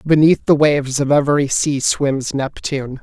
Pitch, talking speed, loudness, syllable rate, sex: 140 Hz, 160 wpm, -16 LUFS, 4.8 syllables/s, male